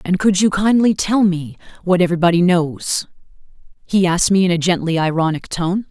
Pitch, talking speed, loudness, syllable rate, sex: 180 Hz, 175 wpm, -16 LUFS, 5.5 syllables/s, female